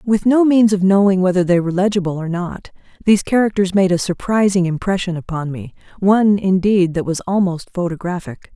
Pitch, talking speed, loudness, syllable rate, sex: 190 Hz, 175 wpm, -16 LUFS, 5.7 syllables/s, female